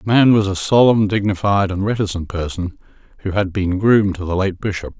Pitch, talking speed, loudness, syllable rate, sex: 100 Hz, 205 wpm, -17 LUFS, 5.4 syllables/s, male